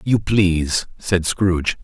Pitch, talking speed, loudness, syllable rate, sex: 90 Hz, 165 wpm, -19 LUFS, 4.4 syllables/s, male